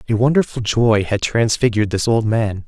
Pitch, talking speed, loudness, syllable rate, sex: 110 Hz, 180 wpm, -17 LUFS, 5.3 syllables/s, male